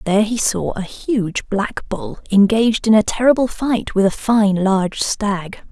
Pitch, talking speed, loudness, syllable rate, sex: 210 Hz, 180 wpm, -17 LUFS, 4.3 syllables/s, female